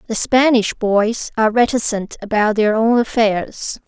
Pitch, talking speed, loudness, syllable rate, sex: 220 Hz, 140 wpm, -16 LUFS, 4.3 syllables/s, female